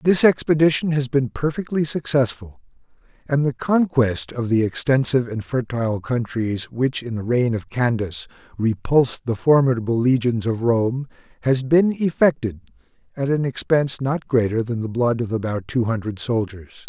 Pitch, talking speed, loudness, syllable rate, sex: 125 Hz, 155 wpm, -21 LUFS, 4.9 syllables/s, male